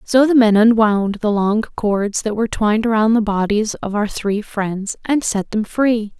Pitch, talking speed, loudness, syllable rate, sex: 215 Hz, 205 wpm, -17 LUFS, 4.4 syllables/s, female